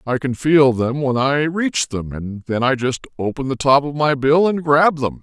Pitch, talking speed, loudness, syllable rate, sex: 135 Hz, 240 wpm, -18 LUFS, 4.4 syllables/s, male